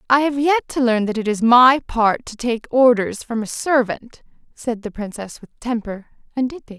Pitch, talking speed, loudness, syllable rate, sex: 235 Hz, 205 wpm, -18 LUFS, 4.9 syllables/s, female